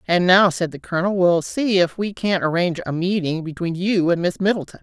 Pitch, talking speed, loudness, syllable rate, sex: 180 Hz, 225 wpm, -20 LUFS, 5.6 syllables/s, female